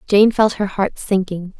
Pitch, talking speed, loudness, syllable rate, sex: 200 Hz, 190 wpm, -17 LUFS, 4.3 syllables/s, female